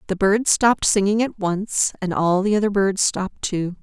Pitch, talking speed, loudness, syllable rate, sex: 200 Hz, 205 wpm, -20 LUFS, 4.9 syllables/s, female